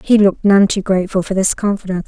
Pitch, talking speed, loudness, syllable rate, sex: 195 Hz, 230 wpm, -15 LUFS, 7.1 syllables/s, female